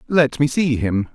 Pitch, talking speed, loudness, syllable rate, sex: 135 Hz, 210 wpm, -19 LUFS, 4.2 syllables/s, male